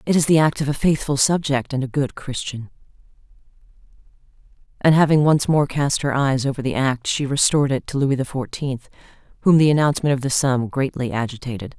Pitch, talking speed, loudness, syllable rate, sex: 135 Hz, 190 wpm, -20 LUFS, 5.8 syllables/s, female